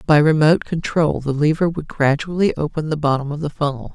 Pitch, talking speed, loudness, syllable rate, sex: 150 Hz, 200 wpm, -19 LUFS, 5.8 syllables/s, female